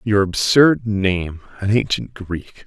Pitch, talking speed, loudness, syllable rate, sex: 105 Hz, 135 wpm, -18 LUFS, 3.4 syllables/s, male